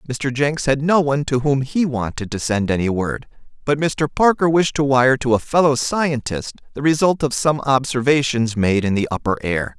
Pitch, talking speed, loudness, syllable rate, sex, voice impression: 135 Hz, 200 wpm, -18 LUFS, 4.9 syllables/s, male, very masculine, middle-aged, very thick, tensed, very powerful, very bright, soft, very clear, fluent, very cool, very intellectual, slightly refreshing, sincere, calm, very mature, very friendly, very reassuring, unique, elegant, wild, very sweet, very lively, very kind, slightly intense